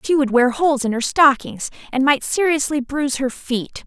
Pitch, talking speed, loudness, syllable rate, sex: 275 Hz, 200 wpm, -18 LUFS, 5.1 syllables/s, female